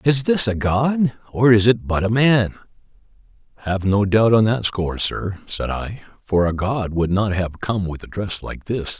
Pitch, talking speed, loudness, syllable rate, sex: 105 Hz, 205 wpm, -19 LUFS, 4.4 syllables/s, male